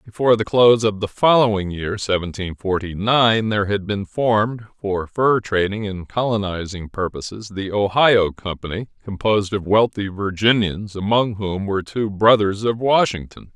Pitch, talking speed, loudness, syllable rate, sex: 105 Hz, 150 wpm, -19 LUFS, 4.6 syllables/s, male